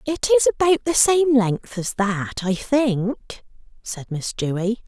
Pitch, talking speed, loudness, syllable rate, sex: 235 Hz, 160 wpm, -20 LUFS, 3.7 syllables/s, female